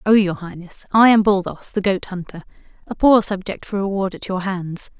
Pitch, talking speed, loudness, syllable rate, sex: 195 Hz, 205 wpm, -19 LUFS, 5.1 syllables/s, female